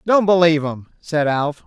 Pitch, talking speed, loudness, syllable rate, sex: 160 Hz, 180 wpm, -17 LUFS, 4.9 syllables/s, male